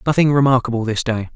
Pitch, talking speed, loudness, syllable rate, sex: 125 Hz, 175 wpm, -17 LUFS, 6.8 syllables/s, male